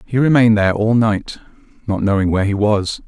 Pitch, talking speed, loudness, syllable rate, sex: 105 Hz, 195 wpm, -16 LUFS, 6.2 syllables/s, male